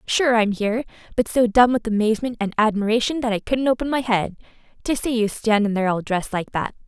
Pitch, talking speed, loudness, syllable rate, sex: 225 Hz, 200 wpm, -21 LUFS, 6.2 syllables/s, female